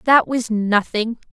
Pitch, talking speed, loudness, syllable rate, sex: 225 Hz, 135 wpm, -19 LUFS, 3.7 syllables/s, female